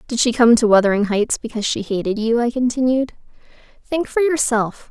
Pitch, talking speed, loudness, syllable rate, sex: 235 Hz, 185 wpm, -18 LUFS, 5.7 syllables/s, female